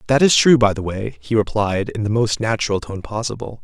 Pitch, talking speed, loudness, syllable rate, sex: 110 Hz, 230 wpm, -18 LUFS, 5.6 syllables/s, male